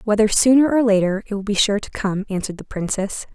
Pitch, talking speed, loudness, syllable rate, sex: 210 Hz, 235 wpm, -19 LUFS, 6.1 syllables/s, female